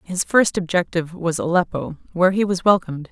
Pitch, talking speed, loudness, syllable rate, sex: 175 Hz, 175 wpm, -20 LUFS, 6.0 syllables/s, female